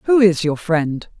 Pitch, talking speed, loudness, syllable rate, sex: 180 Hz, 200 wpm, -17 LUFS, 3.6 syllables/s, female